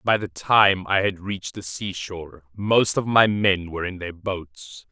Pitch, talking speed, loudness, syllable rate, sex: 95 Hz, 195 wpm, -22 LUFS, 4.3 syllables/s, male